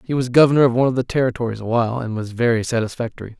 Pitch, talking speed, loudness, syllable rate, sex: 120 Hz, 250 wpm, -19 LUFS, 7.9 syllables/s, male